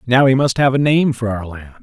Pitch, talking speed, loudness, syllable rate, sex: 125 Hz, 295 wpm, -15 LUFS, 5.5 syllables/s, male